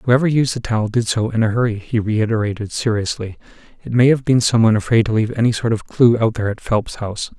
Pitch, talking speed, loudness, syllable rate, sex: 115 Hz, 245 wpm, -18 LUFS, 6.5 syllables/s, male